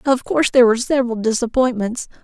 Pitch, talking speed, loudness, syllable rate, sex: 245 Hz, 160 wpm, -17 LUFS, 7.0 syllables/s, female